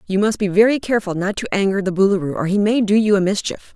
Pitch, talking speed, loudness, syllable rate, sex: 200 Hz, 270 wpm, -18 LUFS, 6.7 syllables/s, female